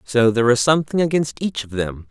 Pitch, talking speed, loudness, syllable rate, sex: 130 Hz, 230 wpm, -19 LUFS, 6.0 syllables/s, male